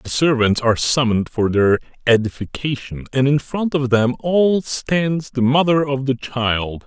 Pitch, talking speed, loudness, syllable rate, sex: 130 Hz, 165 wpm, -18 LUFS, 4.3 syllables/s, male